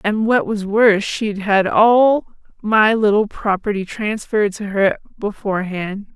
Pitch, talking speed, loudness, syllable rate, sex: 210 Hz, 135 wpm, -17 LUFS, 4.2 syllables/s, female